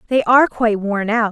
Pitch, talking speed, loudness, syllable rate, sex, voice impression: 225 Hz, 230 wpm, -16 LUFS, 6.0 syllables/s, female, feminine, slightly adult-like, cute, slightly refreshing, friendly, slightly lively